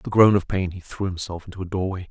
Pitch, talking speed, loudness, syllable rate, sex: 95 Hz, 315 wpm, -23 LUFS, 6.8 syllables/s, male